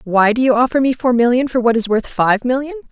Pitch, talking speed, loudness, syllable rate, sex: 245 Hz, 270 wpm, -15 LUFS, 6.0 syllables/s, female